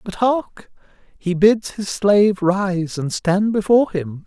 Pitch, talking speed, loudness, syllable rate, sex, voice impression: 195 Hz, 155 wpm, -18 LUFS, 3.8 syllables/s, male, masculine, adult-like, tensed, powerful, bright, slightly raspy, slightly mature, friendly, reassuring, kind, modest